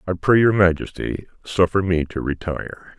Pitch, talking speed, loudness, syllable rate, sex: 90 Hz, 160 wpm, -20 LUFS, 5.1 syllables/s, male